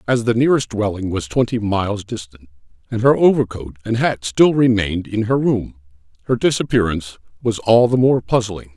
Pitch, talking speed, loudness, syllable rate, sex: 110 Hz, 170 wpm, -18 LUFS, 5.4 syllables/s, male